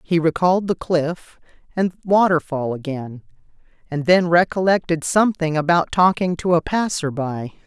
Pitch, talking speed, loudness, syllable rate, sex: 165 Hz, 135 wpm, -19 LUFS, 4.8 syllables/s, female